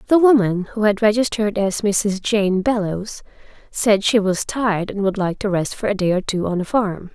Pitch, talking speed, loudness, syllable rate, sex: 205 Hz, 220 wpm, -19 LUFS, 5.0 syllables/s, female